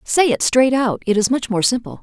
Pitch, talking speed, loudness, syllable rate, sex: 245 Hz, 265 wpm, -17 LUFS, 5.3 syllables/s, female